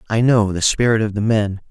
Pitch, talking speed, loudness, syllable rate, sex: 110 Hz, 245 wpm, -17 LUFS, 5.5 syllables/s, male